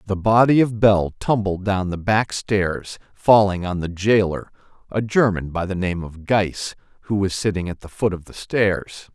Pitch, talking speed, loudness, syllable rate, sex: 100 Hz, 190 wpm, -20 LUFS, 4.4 syllables/s, male